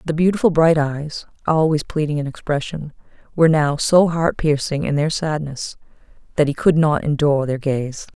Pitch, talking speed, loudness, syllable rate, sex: 150 Hz, 170 wpm, -19 LUFS, 5.1 syllables/s, female